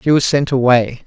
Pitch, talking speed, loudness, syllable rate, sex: 130 Hz, 225 wpm, -14 LUFS, 5.3 syllables/s, male